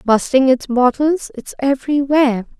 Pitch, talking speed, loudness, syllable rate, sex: 265 Hz, 140 wpm, -16 LUFS, 5.2 syllables/s, female